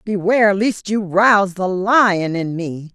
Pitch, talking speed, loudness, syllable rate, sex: 195 Hz, 165 wpm, -16 LUFS, 3.9 syllables/s, female